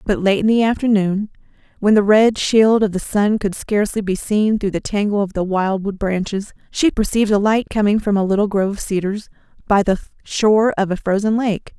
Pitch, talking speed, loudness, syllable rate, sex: 205 Hz, 215 wpm, -17 LUFS, 5.5 syllables/s, female